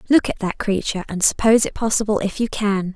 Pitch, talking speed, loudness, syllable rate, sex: 210 Hz, 225 wpm, -19 LUFS, 6.3 syllables/s, female